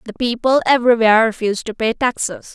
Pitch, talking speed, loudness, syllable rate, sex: 230 Hz, 165 wpm, -16 LUFS, 6.5 syllables/s, female